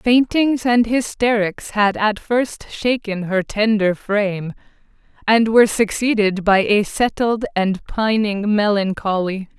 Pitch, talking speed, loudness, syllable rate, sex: 215 Hz, 120 wpm, -18 LUFS, 3.8 syllables/s, female